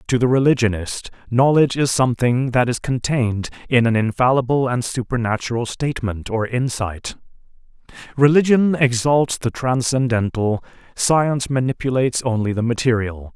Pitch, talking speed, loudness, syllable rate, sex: 125 Hz, 115 wpm, -19 LUFS, 5.1 syllables/s, male